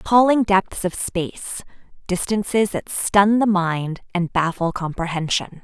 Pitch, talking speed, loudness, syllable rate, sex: 190 Hz, 130 wpm, -20 LUFS, 4.2 syllables/s, female